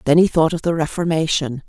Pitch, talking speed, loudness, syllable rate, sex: 160 Hz, 215 wpm, -18 LUFS, 5.9 syllables/s, female